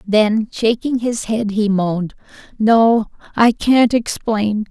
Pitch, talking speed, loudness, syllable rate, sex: 220 Hz, 125 wpm, -16 LUFS, 3.4 syllables/s, female